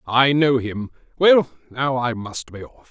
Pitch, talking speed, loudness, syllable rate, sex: 130 Hz, 185 wpm, -19 LUFS, 4.4 syllables/s, male